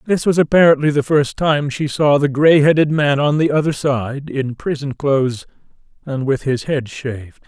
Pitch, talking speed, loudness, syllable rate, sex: 140 Hz, 185 wpm, -16 LUFS, 4.7 syllables/s, male